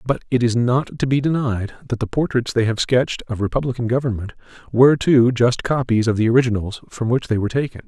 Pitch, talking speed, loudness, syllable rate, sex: 120 Hz, 215 wpm, -19 LUFS, 6.1 syllables/s, male